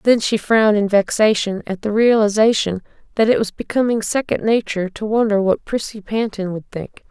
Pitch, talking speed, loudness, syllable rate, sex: 210 Hz, 175 wpm, -18 LUFS, 5.3 syllables/s, female